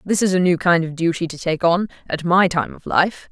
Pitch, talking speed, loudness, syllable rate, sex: 175 Hz, 255 wpm, -19 LUFS, 5.3 syllables/s, female